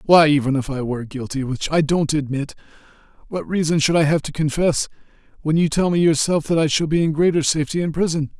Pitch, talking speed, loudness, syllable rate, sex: 155 Hz, 220 wpm, -19 LUFS, 6.1 syllables/s, male